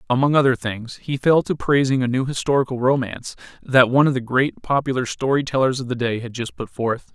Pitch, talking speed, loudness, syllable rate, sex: 130 Hz, 220 wpm, -20 LUFS, 5.9 syllables/s, male